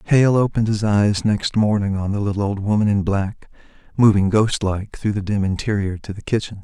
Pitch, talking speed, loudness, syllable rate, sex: 105 Hz, 210 wpm, -19 LUFS, 5.3 syllables/s, male